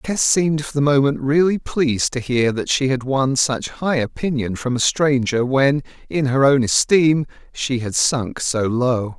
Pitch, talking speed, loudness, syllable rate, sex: 135 Hz, 190 wpm, -18 LUFS, 4.3 syllables/s, male